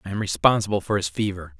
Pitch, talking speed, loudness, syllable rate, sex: 95 Hz, 225 wpm, -23 LUFS, 6.7 syllables/s, male